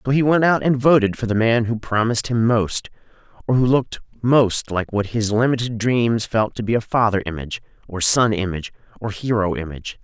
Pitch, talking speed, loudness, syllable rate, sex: 115 Hz, 205 wpm, -19 LUFS, 5.6 syllables/s, male